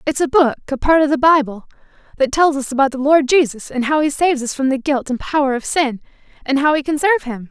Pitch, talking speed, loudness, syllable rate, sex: 280 Hz, 250 wpm, -16 LUFS, 6.2 syllables/s, female